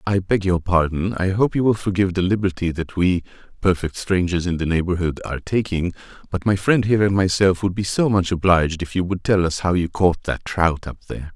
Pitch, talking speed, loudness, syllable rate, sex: 90 Hz, 215 wpm, -20 LUFS, 5.7 syllables/s, male